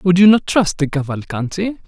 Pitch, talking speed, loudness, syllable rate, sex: 175 Hz, 190 wpm, -16 LUFS, 5.0 syllables/s, male